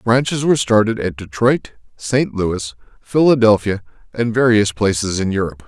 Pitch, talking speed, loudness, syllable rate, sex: 110 Hz, 135 wpm, -17 LUFS, 4.9 syllables/s, male